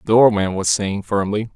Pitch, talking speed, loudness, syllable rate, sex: 105 Hz, 195 wpm, -18 LUFS, 5.2 syllables/s, male